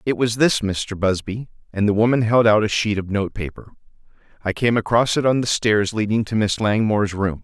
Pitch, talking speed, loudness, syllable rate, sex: 105 Hz, 220 wpm, -19 LUFS, 5.3 syllables/s, male